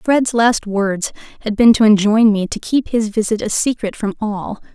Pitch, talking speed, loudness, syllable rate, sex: 215 Hz, 200 wpm, -16 LUFS, 4.6 syllables/s, female